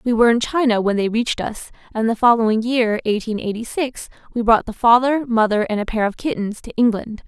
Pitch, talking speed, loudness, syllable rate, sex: 230 Hz, 225 wpm, -19 LUFS, 5.8 syllables/s, female